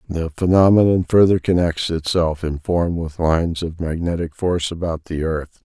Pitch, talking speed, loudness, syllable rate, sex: 85 Hz, 160 wpm, -19 LUFS, 4.9 syllables/s, male